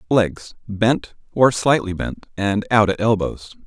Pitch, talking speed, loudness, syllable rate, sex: 105 Hz, 130 wpm, -19 LUFS, 3.7 syllables/s, male